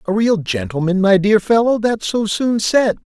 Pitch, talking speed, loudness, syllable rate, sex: 215 Hz, 175 wpm, -16 LUFS, 4.5 syllables/s, female